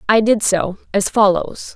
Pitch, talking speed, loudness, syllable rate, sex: 205 Hz, 170 wpm, -16 LUFS, 4.1 syllables/s, female